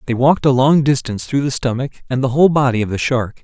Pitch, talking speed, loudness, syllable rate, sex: 130 Hz, 260 wpm, -16 LUFS, 6.8 syllables/s, male